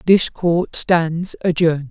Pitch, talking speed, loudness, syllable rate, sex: 170 Hz, 125 wpm, -18 LUFS, 3.5 syllables/s, female